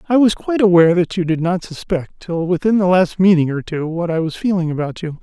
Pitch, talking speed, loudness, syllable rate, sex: 175 Hz, 255 wpm, -17 LUFS, 6.0 syllables/s, male